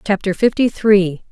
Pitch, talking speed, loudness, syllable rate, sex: 200 Hz, 135 wpm, -15 LUFS, 4.2 syllables/s, female